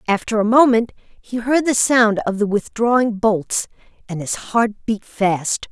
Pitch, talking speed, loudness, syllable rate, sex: 220 Hz, 170 wpm, -18 LUFS, 4.1 syllables/s, female